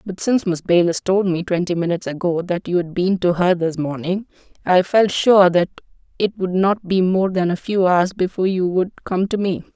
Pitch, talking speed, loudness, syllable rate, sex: 185 Hz, 220 wpm, -18 LUFS, 5.2 syllables/s, female